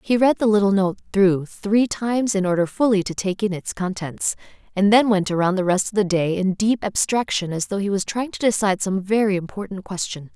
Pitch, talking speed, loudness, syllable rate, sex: 200 Hz, 225 wpm, -21 LUFS, 5.5 syllables/s, female